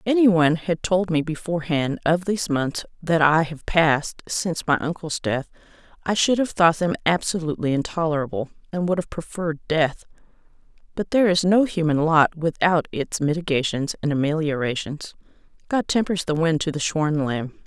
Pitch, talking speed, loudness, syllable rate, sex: 160 Hz, 165 wpm, -22 LUFS, 5.4 syllables/s, female